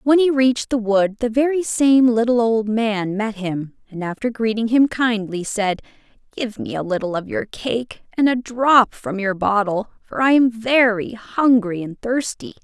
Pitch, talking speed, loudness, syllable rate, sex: 225 Hz, 185 wpm, -19 LUFS, 4.4 syllables/s, female